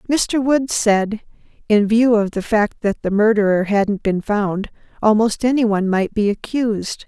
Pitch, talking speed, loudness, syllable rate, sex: 215 Hz, 170 wpm, -18 LUFS, 4.5 syllables/s, female